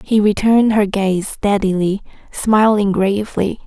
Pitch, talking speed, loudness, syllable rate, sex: 205 Hz, 115 wpm, -16 LUFS, 4.3 syllables/s, female